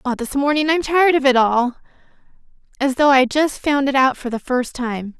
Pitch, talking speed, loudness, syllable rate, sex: 265 Hz, 220 wpm, -17 LUFS, 5.2 syllables/s, female